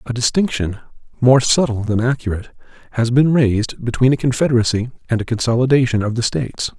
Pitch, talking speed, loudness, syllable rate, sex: 120 Hz, 160 wpm, -17 LUFS, 6.2 syllables/s, male